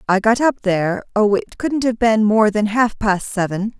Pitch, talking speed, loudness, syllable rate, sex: 215 Hz, 205 wpm, -17 LUFS, 4.6 syllables/s, female